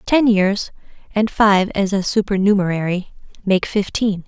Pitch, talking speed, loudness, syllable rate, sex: 200 Hz, 125 wpm, -18 LUFS, 4.4 syllables/s, female